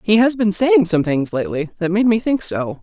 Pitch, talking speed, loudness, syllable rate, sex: 195 Hz, 255 wpm, -17 LUFS, 5.3 syllables/s, female